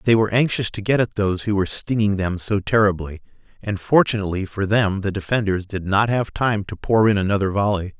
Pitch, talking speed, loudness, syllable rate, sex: 100 Hz, 210 wpm, -20 LUFS, 5.9 syllables/s, male